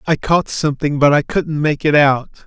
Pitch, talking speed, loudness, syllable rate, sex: 145 Hz, 220 wpm, -15 LUFS, 5.1 syllables/s, male